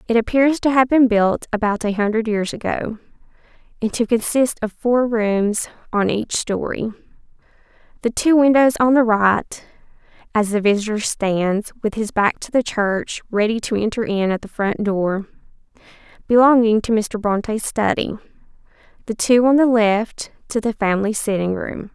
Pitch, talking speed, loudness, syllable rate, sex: 220 Hz, 160 wpm, -18 LUFS, 3.5 syllables/s, female